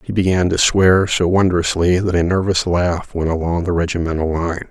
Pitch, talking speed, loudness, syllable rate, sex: 90 Hz, 190 wpm, -17 LUFS, 5.1 syllables/s, male